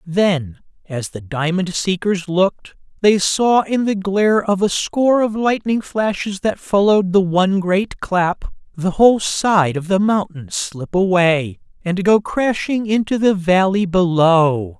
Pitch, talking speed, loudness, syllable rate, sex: 190 Hz, 155 wpm, -17 LUFS, 4.0 syllables/s, male